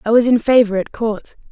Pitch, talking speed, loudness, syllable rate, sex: 225 Hz, 240 wpm, -15 LUFS, 5.5 syllables/s, female